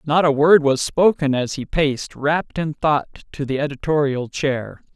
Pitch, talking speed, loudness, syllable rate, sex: 145 Hz, 180 wpm, -19 LUFS, 4.7 syllables/s, male